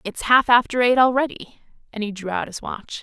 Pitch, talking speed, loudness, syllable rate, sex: 235 Hz, 220 wpm, -20 LUFS, 5.3 syllables/s, female